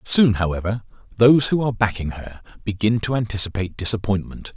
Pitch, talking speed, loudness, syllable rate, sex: 105 Hz, 145 wpm, -20 LUFS, 6.2 syllables/s, male